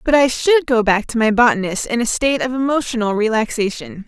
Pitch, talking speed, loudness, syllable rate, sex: 240 Hz, 205 wpm, -17 LUFS, 5.8 syllables/s, female